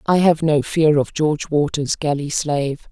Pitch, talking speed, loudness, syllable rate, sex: 150 Hz, 185 wpm, -18 LUFS, 4.7 syllables/s, female